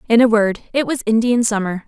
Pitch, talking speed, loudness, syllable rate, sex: 225 Hz, 225 wpm, -17 LUFS, 5.7 syllables/s, female